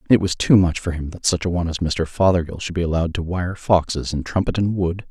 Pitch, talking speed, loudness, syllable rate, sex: 85 Hz, 270 wpm, -20 LUFS, 6.3 syllables/s, male